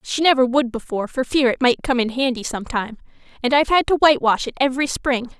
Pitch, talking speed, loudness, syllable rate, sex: 255 Hz, 220 wpm, -19 LUFS, 6.9 syllables/s, female